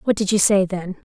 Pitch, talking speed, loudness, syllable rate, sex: 195 Hz, 270 wpm, -19 LUFS, 5.4 syllables/s, female